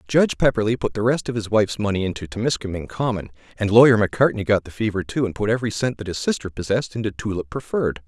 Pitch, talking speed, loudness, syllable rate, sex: 110 Hz, 225 wpm, -21 LUFS, 7.0 syllables/s, male